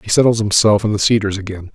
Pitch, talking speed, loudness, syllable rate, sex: 105 Hz, 240 wpm, -15 LUFS, 6.4 syllables/s, male